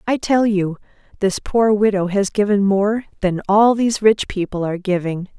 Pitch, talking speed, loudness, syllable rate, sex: 200 Hz, 180 wpm, -18 LUFS, 4.9 syllables/s, female